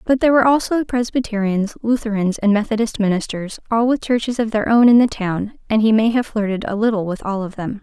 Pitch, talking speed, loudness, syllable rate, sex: 220 Hz, 220 wpm, -18 LUFS, 6.0 syllables/s, female